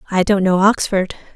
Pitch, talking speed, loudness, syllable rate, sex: 195 Hz, 175 wpm, -16 LUFS, 5.2 syllables/s, female